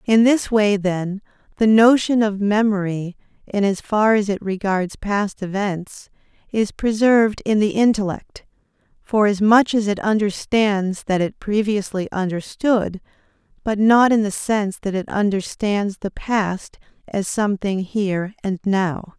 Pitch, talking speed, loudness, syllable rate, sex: 205 Hz, 140 wpm, -19 LUFS, 4.1 syllables/s, female